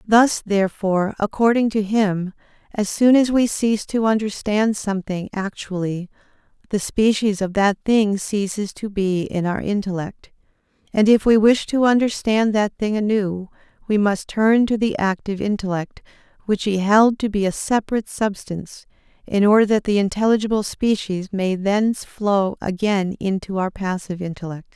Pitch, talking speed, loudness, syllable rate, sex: 205 Hz, 155 wpm, -20 LUFS, 4.8 syllables/s, female